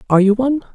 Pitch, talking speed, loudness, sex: 235 Hz, 240 wpm, -15 LUFS, female